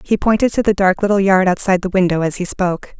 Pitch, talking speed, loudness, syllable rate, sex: 190 Hz, 260 wpm, -15 LUFS, 6.6 syllables/s, female